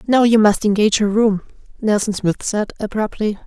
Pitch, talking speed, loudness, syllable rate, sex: 210 Hz, 175 wpm, -17 LUFS, 5.3 syllables/s, female